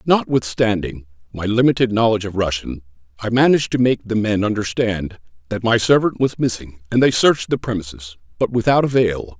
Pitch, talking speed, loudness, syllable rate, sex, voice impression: 110 Hz, 165 wpm, -18 LUFS, 5.6 syllables/s, male, very masculine, old, very thick, tensed, powerful, slightly dark, slightly hard, slightly muffled, slightly raspy, cool, intellectual, sincere, very calm, very mature, very friendly, reassuring, very unique, elegant, very wild, slightly sweet, slightly lively, kind, slightly intense